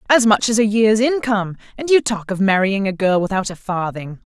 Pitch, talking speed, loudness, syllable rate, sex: 210 Hz, 210 wpm, -17 LUFS, 5.5 syllables/s, female